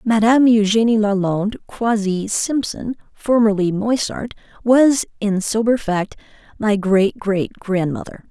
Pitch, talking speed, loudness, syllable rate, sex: 215 Hz, 95 wpm, -18 LUFS, 4.1 syllables/s, female